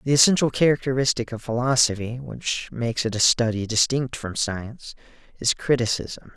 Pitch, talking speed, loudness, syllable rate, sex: 120 Hz, 140 wpm, -22 LUFS, 5.2 syllables/s, male